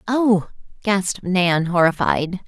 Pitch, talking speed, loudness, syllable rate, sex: 190 Hz, 95 wpm, -19 LUFS, 3.6 syllables/s, female